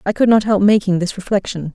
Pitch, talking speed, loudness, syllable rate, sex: 200 Hz, 240 wpm, -16 LUFS, 6.1 syllables/s, female